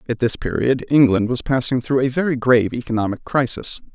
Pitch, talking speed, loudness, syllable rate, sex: 125 Hz, 180 wpm, -19 LUFS, 5.8 syllables/s, male